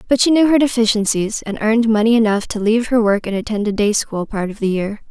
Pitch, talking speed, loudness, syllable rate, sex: 220 Hz, 260 wpm, -16 LUFS, 6.1 syllables/s, female